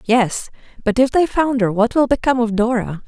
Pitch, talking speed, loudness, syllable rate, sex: 240 Hz, 195 wpm, -17 LUFS, 5.2 syllables/s, female